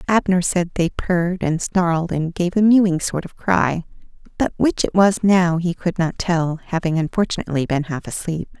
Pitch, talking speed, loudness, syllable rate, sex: 175 Hz, 190 wpm, -19 LUFS, 5.0 syllables/s, female